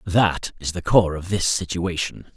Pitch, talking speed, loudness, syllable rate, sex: 90 Hz, 180 wpm, -22 LUFS, 4.3 syllables/s, male